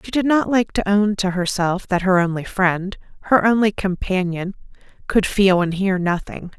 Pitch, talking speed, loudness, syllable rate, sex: 195 Hz, 180 wpm, -19 LUFS, 4.7 syllables/s, female